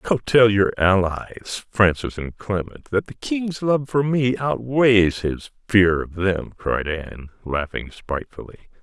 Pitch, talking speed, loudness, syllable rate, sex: 105 Hz, 150 wpm, -21 LUFS, 3.9 syllables/s, male